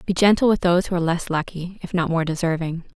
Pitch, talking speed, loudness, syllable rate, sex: 175 Hz, 240 wpm, -21 LUFS, 6.6 syllables/s, female